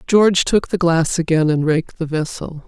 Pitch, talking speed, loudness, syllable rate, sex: 165 Hz, 200 wpm, -17 LUFS, 5.1 syllables/s, female